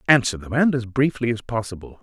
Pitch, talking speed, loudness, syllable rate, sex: 120 Hz, 210 wpm, -21 LUFS, 6.0 syllables/s, male